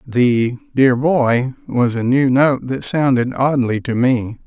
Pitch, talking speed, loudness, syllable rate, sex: 130 Hz, 160 wpm, -16 LUFS, 3.6 syllables/s, male